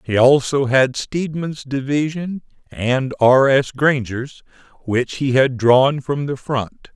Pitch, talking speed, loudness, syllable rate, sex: 135 Hz, 140 wpm, -18 LUFS, 3.5 syllables/s, male